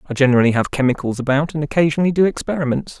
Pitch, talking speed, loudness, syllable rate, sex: 145 Hz, 180 wpm, -18 LUFS, 7.6 syllables/s, male